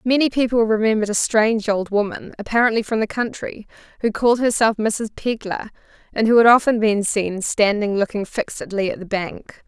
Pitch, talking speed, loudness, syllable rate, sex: 220 Hz, 175 wpm, -19 LUFS, 5.4 syllables/s, female